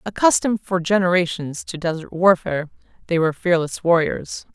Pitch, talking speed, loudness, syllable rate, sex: 175 Hz, 130 wpm, -20 LUFS, 5.5 syllables/s, female